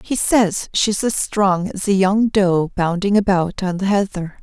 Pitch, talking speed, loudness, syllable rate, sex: 195 Hz, 190 wpm, -18 LUFS, 4.0 syllables/s, female